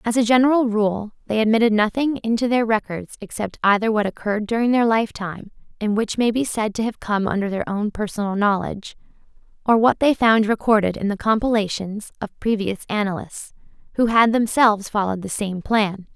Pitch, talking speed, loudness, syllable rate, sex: 215 Hz, 180 wpm, -20 LUFS, 5.6 syllables/s, female